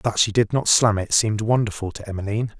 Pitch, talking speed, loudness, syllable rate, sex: 110 Hz, 230 wpm, -20 LUFS, 6.3 syllables/s, male